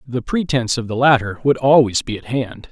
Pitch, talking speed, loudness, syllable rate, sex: 125 Hz, 220 wpm, -17 LUFS, 5.5 syllables/s, male